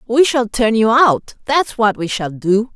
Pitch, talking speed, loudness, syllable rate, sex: 230 Hz, 220 wpm, -15 LUFS, 4.0 syllables/s, female